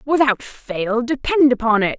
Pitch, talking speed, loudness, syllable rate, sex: 250 Hz, 150 wpm, -18 LUFS, 4.3 syllables/s, female